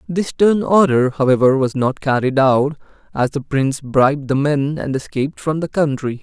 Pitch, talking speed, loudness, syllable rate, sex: 140 Hz, 185 wpm, -17 LUFS, 4.9 syllables/s, male